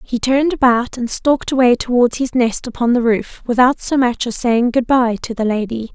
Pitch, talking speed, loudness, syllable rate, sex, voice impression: 245 Hz, 220 wpm, -16 LUFS, 5.2 syllables/s, female, feminine, slightly adult-like, slightly cute, slightly refreshing, friendly